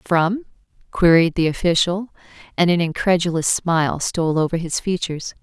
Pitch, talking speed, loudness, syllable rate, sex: 170 Hz, 135 wpm, -19 LUFS, 5.2 syllables/s, female